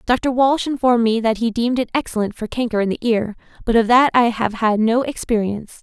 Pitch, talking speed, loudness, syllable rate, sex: 230 Hz, 225 wpm, -18 LUFS, 5.8 syllables/s, female